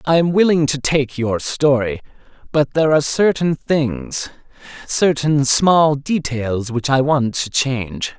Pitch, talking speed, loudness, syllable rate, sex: 140 Hz, 145 wpm, -17 LUFS, 4.0 syllables/s, male